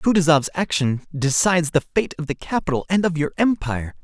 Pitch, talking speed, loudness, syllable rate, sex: 160 Hz, 180 wpm, -21 LUFS, 5.7 syllables/s, male